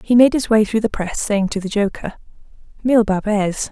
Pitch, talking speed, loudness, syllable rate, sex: 215 Hz, 210 wpm, -18 LUFS, 6.3 syllables/s, female